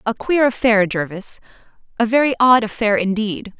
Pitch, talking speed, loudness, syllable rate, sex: 225 Hz, 150 wpm, -17 LUFS, 5.0 syllables/s, female